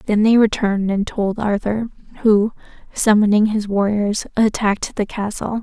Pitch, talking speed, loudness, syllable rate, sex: 210 Hz, 140 wpm, -18 LUFS, 4.8 syllables/s, female